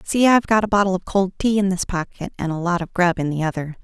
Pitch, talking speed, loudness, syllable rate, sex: 185 Hz, 295 wpm, -20 LUFS, 6.4 syllables/s, female